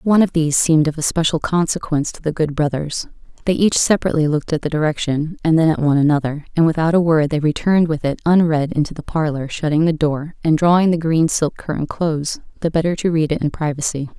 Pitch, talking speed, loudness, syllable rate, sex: 160 Hz, 220 wpm, -18 LUFS, 6.4 syllables/s, female